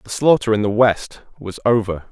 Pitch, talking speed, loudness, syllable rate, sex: 110 Hz, 200 wpm, -17 LUFS, 4.8 syllables/s, male